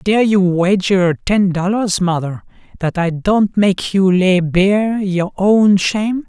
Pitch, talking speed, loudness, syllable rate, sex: 190 Hz, 155 wpm, -15 LUFS, 3.5 syllables/s, male